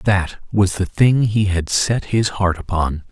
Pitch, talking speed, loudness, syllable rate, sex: 95 Hz, 195 wpm, -18 LUFS, 3.8 syllables/s, male